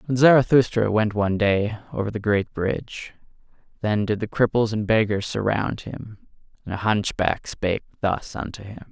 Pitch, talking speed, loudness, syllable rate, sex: 105 Hz, 160 wpm, -22 LUFS, 4.9 syllables/s, male